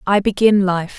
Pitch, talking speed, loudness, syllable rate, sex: 195 Hz, 180 wpm, -16 LUFS, 4.6 syllables/s, female